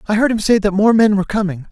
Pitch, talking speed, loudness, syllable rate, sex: 205 Hz, 315 wpm, -15 LUFS, 7.1 syllables/s, male